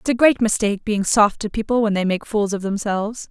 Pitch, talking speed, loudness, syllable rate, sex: 210 Hz, 255 wpm, -19 LUFS, 5.8 syllables/s, female